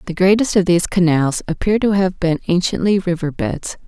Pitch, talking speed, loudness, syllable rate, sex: 180 Hz, 185 wpm, -17 LUFS, 5.4 syllables/s, female